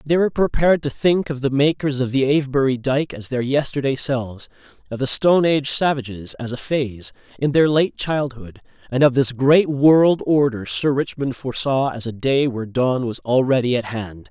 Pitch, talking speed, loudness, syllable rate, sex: 135 Hz, 195 wpm, -19 LUFS, 5.3 syllables/s, male